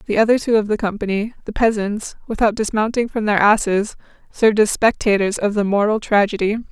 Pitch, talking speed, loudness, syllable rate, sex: 210 Hz, 180 wpm, -18 LUFS, 5.8 syllables/s, female